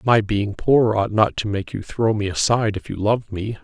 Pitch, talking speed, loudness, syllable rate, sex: 105 Hz, 250 wpm, -20 LUFS, 5.2 syllables/s, male